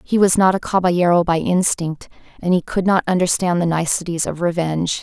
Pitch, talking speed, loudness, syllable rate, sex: 175 Hz, 190 wpm, -18 LUFS, 5.7 syllables/s, female